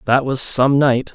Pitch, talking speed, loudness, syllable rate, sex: 130 Hz, 210 wpm, -16 LUFS, 4.0 syllables/s, male